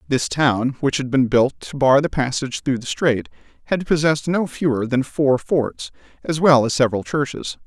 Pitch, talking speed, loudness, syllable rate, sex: 130 Hz, 195 wpm, -19 LUFS, 4.9 syllables/s, male